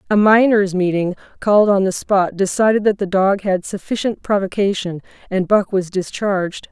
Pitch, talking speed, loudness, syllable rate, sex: 195 Hz, 160 wpm, -17 LUFS, 5.0 syllables/s, female